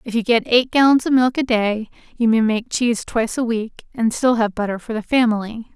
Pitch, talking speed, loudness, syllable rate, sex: 230 Hz, 240 wpm, -18 LUFS, 5.5 syllables/s, female